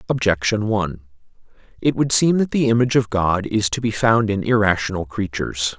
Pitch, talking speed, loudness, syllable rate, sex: 105 Hz, 175 wpm, -19 LUFS, 5.6 syllables/s, male